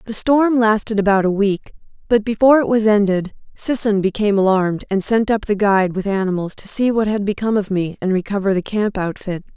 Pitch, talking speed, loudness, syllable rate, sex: 205 Hz, 205 wpm, -17 LUFS, 5.9 syllables/s, female